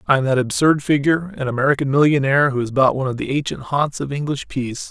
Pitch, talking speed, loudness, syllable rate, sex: 140 Hz, 230 wpm, -19 LUFS, 6.8 syllables/s, male